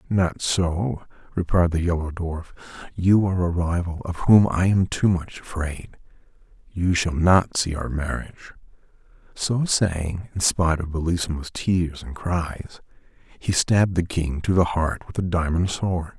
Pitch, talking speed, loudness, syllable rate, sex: 85 Hz, 160 wpm, -23 LUFS, 4.3 syllables/s, male